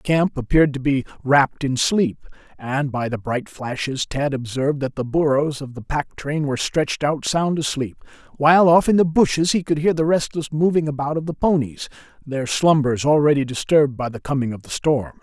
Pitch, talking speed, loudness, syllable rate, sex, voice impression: 145 Hz, 205 wpm, -20 LUFS, 5.3 syllables/s, male, very masculine, very adult-like, very middle-aged, very thick, tensed, powerful, bright, very hard, clear, fluent, raspy, cool, intellectual, very sincere, slightly calm, very mature, friendly, reassuring, unique, very elegant, slightly wild, sweet, lively, kind, slightly intense